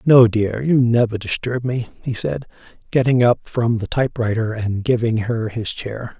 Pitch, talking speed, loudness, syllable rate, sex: 120 Hz, 185 wpm, -19 LUFS, 4.5 syllables/s, male